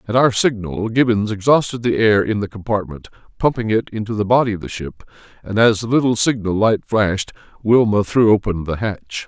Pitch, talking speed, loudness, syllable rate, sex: 105 Hz, 195 wpm, -17 LUFS, 5.5 syllables/s, male